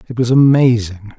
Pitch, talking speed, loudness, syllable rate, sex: 120 Hz, 150 wpm, -12 LUFS, 5.9 syllables/s, male